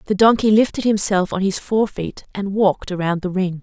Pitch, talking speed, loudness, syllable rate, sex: 195 Hz, 215 wpm, -18 LUFS, 5.4 syllables/s, female